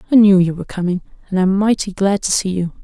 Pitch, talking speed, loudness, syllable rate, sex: 190 Hz, 255 wpm, -16 LUFS, 6.7 syllables/s, female